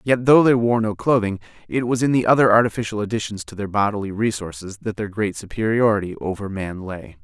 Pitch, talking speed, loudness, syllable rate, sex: 105 Hz, 200 wpm, -20 LUFS, 5.9 syllables/s, male